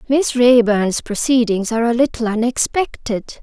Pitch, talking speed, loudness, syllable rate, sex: 235 Hz, 125 wpm, -16 LUFS, 4.6 syllables/s, female